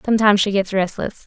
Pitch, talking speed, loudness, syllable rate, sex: 200 Hz, 190 wpm, -18 LUFS, 7.0 syllables/s, female